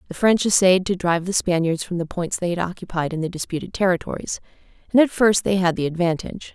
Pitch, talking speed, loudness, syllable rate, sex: 180 Hz, 220 wpm, -21 LUFS, 6.3 syllables/s, female